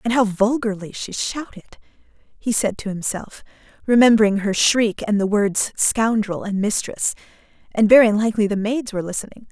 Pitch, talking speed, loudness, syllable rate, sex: 215 Hz, 150 wpm, -19 LUFS, 5.2 syllables/s, female